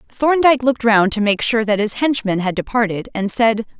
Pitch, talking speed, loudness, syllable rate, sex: 225 Hz, 205 wpm, -17 LUFS, 5.5 syllables/s, female